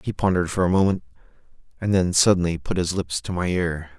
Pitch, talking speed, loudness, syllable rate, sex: 90 Hz, 210 wpm, -22 LUFS, 6.2 syllables/s, male